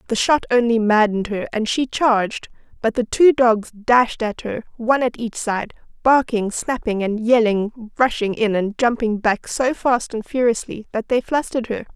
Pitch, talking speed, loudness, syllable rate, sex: 230 Hz, 180 wpm, -19 LUFS, 4.7 syllables/s, female